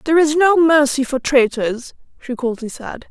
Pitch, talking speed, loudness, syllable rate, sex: 275 Hz, 175 wpm, -16 LUFS, 4.8 syllables/s, female